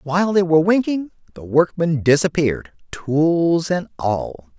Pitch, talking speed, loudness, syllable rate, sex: 160 Hz, 130 wpm, -18 LUFS, 4.4 syllables/s, male